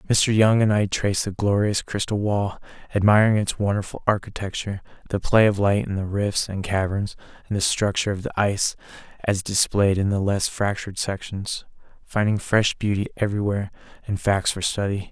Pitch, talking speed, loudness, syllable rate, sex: 100 Hz, 170 wpm, -22 LUFS, 5.5 syllables/s, male